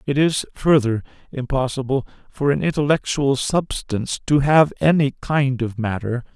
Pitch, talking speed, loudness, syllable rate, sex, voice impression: 135 Hz, 130 wpm, -20 LUFS, 4.7 syllables/s, male, masculine, middle-aged, tensed, slightly weak, soft, raspy, sincere, mature, friendly, reassuring, wild, slightly lively, kind, slightly modest